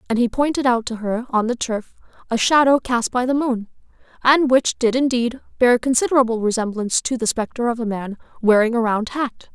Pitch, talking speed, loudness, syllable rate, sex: 240 Hz, 200 wpm, -19 LUFS, 5.5 syllables/s, female